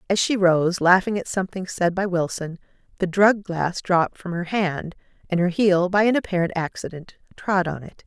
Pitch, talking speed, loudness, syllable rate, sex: 180 Hz, 195 wpm, -22 LUFS, 5.0 syllables/s, female